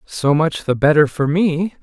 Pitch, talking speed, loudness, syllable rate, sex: 150 Hz, 195 wpm, -16 LUFS, 4.2 syllables/s, male